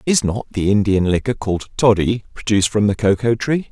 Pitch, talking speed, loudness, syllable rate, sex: 105 Hz, 195 wpm, -18 LUFS, 5.7 syllables/s, male